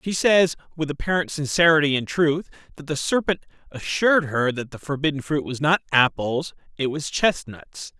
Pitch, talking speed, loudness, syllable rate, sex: 150 Hz, 165 wpm, -22 LUFS, 5.0 syllables/s, male